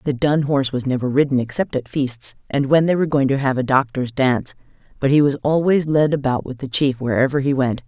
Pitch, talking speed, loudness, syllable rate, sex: 135 Hz, 235 wpm, -19 LUFS, 5.9 syllables/s, female